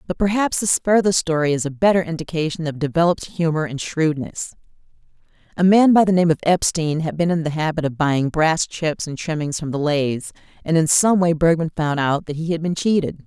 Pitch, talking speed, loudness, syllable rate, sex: 165 Hz, 215 wpm, -19 LUFS, 5.5 syllables/s, female